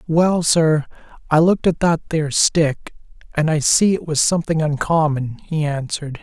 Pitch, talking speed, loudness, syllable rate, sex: 155 Hz, 165 wpm, -18 LUFS, 4.8 syllables/s, male